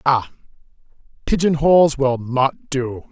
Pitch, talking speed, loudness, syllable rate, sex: 135 Hz, 115 wpm, -18 LUFS, 3.9 syllables/s, male